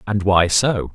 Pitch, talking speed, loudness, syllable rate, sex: 100 Hz, 190 wpm, -17 LUFS, 3.8 syllables/s, male